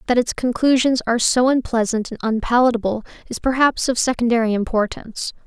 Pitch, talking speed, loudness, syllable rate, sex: 240 Hz, 145 wpm, -19 LUFS, 5.9 syllables/s, female